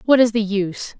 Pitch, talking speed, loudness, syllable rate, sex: 215 Hz, 240 wpm, -19 LUFS, 5.8 syllables/s, female